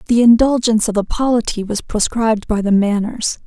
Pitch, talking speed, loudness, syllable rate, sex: 220 Hz, 175 wpm, -16 LUFS, 5.6 syllables/s, female